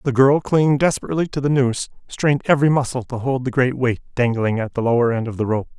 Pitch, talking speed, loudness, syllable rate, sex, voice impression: 130 Hz, 240 wpm, -19 LUFS, 6.6 syllables/s, male, very masculine, very adult-like, middle-aged, thick, slightly relaxed, slightly weak, slightly bright, soft, clear, fluent, slightly raspy, cool, intellectual, very refreshing, sincere, calm, slightly mature, friendly, reassuring, elegant, slightly wild, slightly sweet, lively, kind, slightly modest